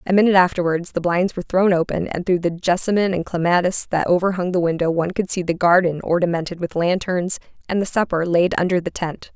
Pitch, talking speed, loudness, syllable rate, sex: 175 Hz, 210 wpm, -19 LUFS, 6.2 syllables/s, female